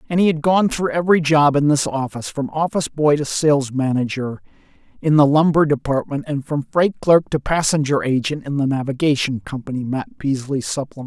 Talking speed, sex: 185 wpm, male